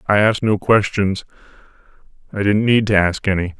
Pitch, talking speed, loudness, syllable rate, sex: 100 Hz, 165 wpm, -17 LUFS, 5.6 syllables/s, male